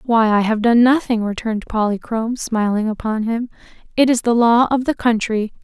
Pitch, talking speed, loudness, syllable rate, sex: 230 Hz, 180 wpm, -17 LUFS, 5.3 syllables/s, female